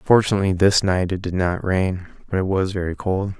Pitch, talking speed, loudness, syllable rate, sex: 95 Hz, 210 wpm, -20 LUFS, 5.5 syllables/s, male